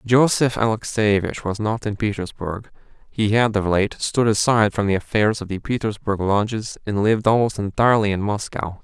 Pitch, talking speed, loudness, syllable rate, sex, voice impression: 105 Hz, 165 wpm, -20 LUFS, 5.2 syllables/s, male, very masculine, very adult-like, slightly thick, tensed, slightly weak, slightly bright, soft, slightly muffled, fluent, slightly raspy, cool, very intellectual, refreshing, sincere, very calm, mature, friendly, very reassuring, slightly unique, elegant, slightly wild, sweet, lively, kind, slightly modest